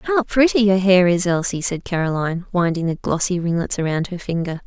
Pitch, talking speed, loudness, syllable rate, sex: 180 Hz, 195 wpm, -19 LUFS, 5.5 syllables/s, female